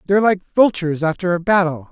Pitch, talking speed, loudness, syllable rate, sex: 180 Hz, 190 wpm, -17 LUFS, 6.4 syllables/s, male